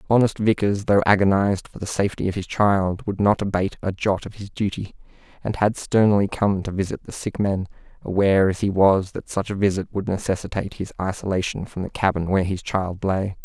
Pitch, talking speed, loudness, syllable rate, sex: 100 Hz, 205 wpm, -22 LUFS, 5.7 syllables/s, male